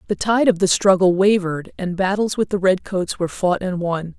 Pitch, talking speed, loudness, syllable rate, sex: 190 Hz, 230 wpm, -19 LUFS, 5.3 syllables/s, female